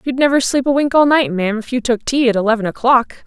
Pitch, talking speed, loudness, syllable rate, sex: 245 Hz, 275 wpm, -15 LUFS, 6.3 syllables/s, female